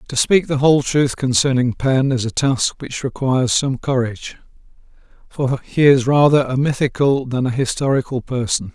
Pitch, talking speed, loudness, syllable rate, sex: 135 Hz, 165 wpm, -17 LUFS, 5.0 syllables/s, male